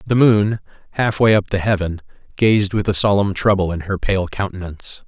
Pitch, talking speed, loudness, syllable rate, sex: 100 Hz, 175 wpm, -18 LUFS, 5.3 syllables/s, male